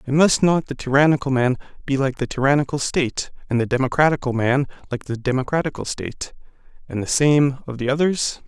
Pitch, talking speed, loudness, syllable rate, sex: 135 Hz, 175 wpm, -20 LUFS, 6.0 syllables/s, male